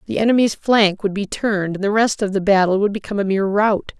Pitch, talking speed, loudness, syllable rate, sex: 205 Hz, 255 wpm, -18 LUFS, 6.3 syllables/s, female